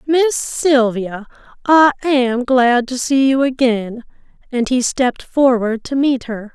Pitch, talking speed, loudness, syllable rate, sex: 255 Hz, 145 wpm, -15 LUFS, 3.7 syllables/s, female